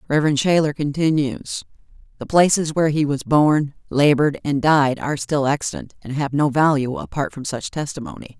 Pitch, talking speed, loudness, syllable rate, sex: 145 Hz, 165 wpm, -19 LUFS, 5.2 syllables/s, female